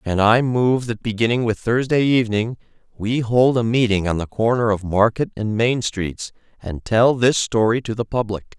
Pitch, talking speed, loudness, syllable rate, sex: 115 Hz, 190 wpm, -19 LUFS, 4.8 syllables/s, male